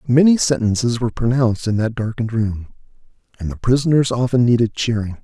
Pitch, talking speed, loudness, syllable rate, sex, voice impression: 115 Hz, 160 wpm, -18 LUFS, 6.2 syllables/s, male, masculine, middle-aged, slightly relaxed, slightly powerful, soft, slightly muffled, slightly raspy, cool, intellectual, calm, slightly mature, slightly friendly, reassuring, wild, slightly lively, kind, modest